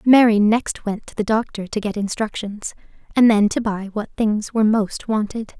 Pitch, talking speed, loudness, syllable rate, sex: 215 Hz, 195 wpm, -20 LUFS, 4.8 syllables/s, female